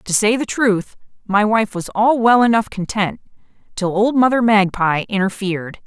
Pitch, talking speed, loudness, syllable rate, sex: 210 Hz, 165 wpm, -17 LUFS, 4.7 syllables/s, female